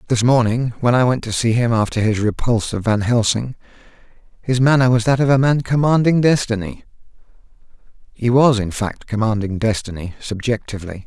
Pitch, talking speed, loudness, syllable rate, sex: 115 Hz, 155 wpm, -17 LUFS, 5.6 syllables/s, male